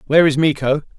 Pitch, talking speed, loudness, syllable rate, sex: 150 Hz, 185 wpm, -16 LUFS, 7.3 syllables/s, male